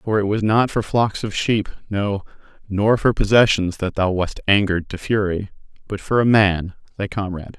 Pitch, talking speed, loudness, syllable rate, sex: 100 Hz, 190 wpm, -19 LUFS, 4.9 syllables/s, male